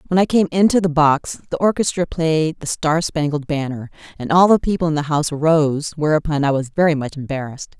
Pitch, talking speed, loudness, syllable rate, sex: 155 Hz, 210 wpm, -18 LUFS, 5.9 syllables/s, female